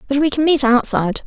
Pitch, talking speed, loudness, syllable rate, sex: 270 Hz, 240 wpm, -16 LUFS, 6.3 syllables/s, female